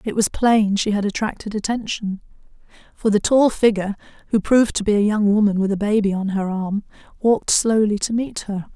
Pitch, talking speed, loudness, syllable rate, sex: 210 Hz, 200 wpm, -19 LUFS, 5.6 syllables/s, female